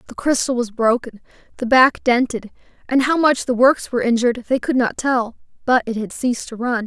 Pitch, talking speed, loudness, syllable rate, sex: 245 Hz, 210 wpm, -18 LUFS, 5.6 syllables/s, female